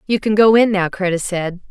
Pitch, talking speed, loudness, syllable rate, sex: 195 Hz, 245 wpm, -16 LUFS, 5.4 syllables/s, female